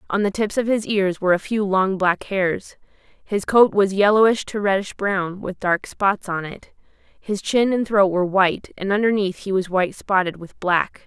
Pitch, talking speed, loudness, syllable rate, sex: 195 Hz, 205 wpm, -20 LUFS, 4.7 syllables/s, female